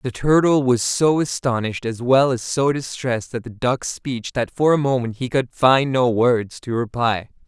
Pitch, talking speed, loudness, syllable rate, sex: 125 Hz, 200 wpm, -20 LUFS, 4.5 syllables/s, male